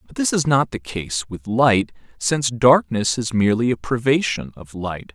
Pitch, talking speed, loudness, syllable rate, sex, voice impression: 115 Hz, 185 wpm, -20 LUFS, 4.7 syllables/s, male, very masculine, adult-like, middle-aged, thick, tensed, powerful, bright, hard, clear, fluent, cool, very intellectual, slightly refreshing, sincere, very calm, slightly mature, very friendly, reassuring, unique, elegant, slightly wild, sweet, lively, strict, slightly intense, slightly modest